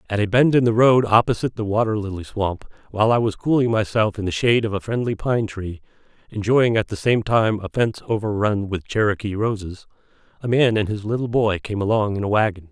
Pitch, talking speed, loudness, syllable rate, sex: 110 Hz, 210 wpm, -20 LUFS, 5.9 syllables/s, male